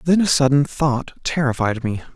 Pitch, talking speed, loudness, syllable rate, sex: 135 Hz, 165 wpm, -19 LUFS, 4.9 syllables/s, male